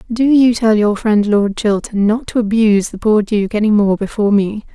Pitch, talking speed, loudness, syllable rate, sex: 215 Hz, 215 wpm, -14 LUFS, 5.1 syllables/s, female